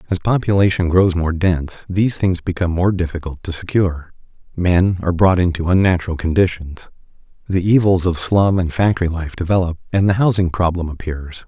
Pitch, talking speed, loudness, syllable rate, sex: 90 Hz, 160 wpm, -17 LUFS, 5.7 syllables/s, male